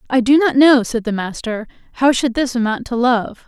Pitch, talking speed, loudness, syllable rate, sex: 245 Hz, 225 wpm, -16 LUFS, 5.1 syllables/s, female